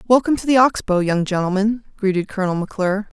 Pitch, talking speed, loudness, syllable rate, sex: 205 Hz, 190 wpm, -19 LUFS, 7.0 syllables/s, female